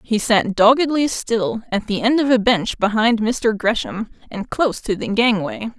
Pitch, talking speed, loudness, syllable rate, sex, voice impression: 220 Hz, 185 wpm, -18 LUFS, 4.5 syllables/s, female, feminine, adult-like, slightly powerful, slightly unique, slightly sharp